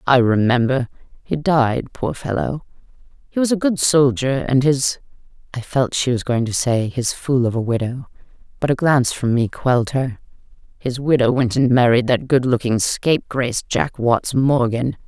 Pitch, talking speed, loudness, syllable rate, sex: 130 Hz, 165 wpm, -18 LUFS, 4.7 syllables/s, female